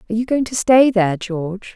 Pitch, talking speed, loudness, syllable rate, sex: 215 Hz, 240 wpm, -17 LUFS, 6.5 syllables/s, female